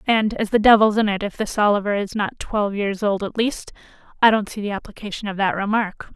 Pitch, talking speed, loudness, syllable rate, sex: 210 Hz, 235 wpm, -20 LUFS, 5.9 syllables/s, female